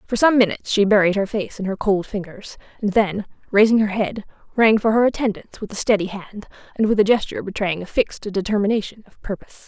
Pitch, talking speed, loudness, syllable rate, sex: 205 Hz, 210 wpm, -20 LUFS, 6.2 syllables/s, female